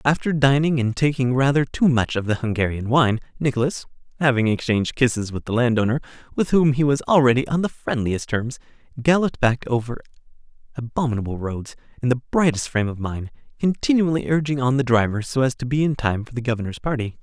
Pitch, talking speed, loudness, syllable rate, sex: 130 Hz, 180 wpm, -21 LUFS, 6.0 syllables/s, male